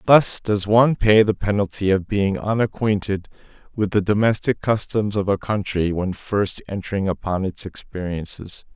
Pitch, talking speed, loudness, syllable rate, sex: 100 Hz, 150 wpm, -21 LUFS, 4.7 syllables/s, male